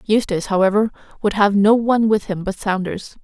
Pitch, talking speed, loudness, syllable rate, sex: 205 Hz, 185 wpm, -18 LUFS, 5.8 syllables/s, female